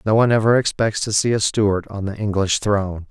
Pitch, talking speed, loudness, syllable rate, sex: 105 Hz, 230 wpm, -19 LUFS, 5.7 syllables/s, male